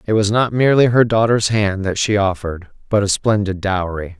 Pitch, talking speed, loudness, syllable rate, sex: 105 Hz, 200 wpm, -16 LUFS, 5.4 syllables/s, male